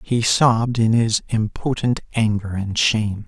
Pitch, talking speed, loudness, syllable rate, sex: 110 Hz, 145 wpm, -19 LUFS, 4.3 syllables/s, male